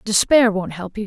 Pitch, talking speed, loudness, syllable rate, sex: 205 Hz, 225 wpm, -16 LUFS, 4.9 syllables/s, female